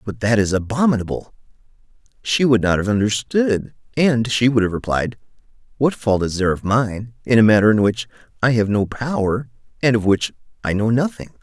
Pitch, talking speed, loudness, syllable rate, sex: 115 Hz, 185 wpm, -18 LUFS, 5.4 syllables/s, male